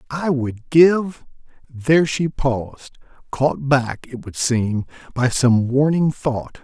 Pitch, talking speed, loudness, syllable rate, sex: 135 Hz, 135 wpm, -19 LUFS, 3.7 syllables/s, male